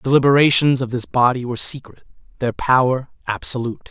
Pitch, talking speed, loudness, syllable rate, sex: 130 Hz, 155 wpm, -17 LUFS, 6.7 syllables/s, male